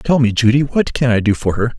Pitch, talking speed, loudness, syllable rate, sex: 120 Hz, 300 wpm, -15 LUFS, 5.9 syllables/s, male